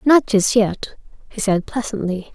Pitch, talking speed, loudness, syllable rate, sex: 215 Hz, 155 wpm, -19 LUFS, 4.2 syllables/s, female